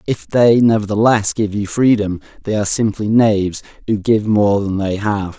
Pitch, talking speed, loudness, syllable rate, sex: 105 Hz, 180 wpm, -16 LUFS, 4.8 syllables/s, male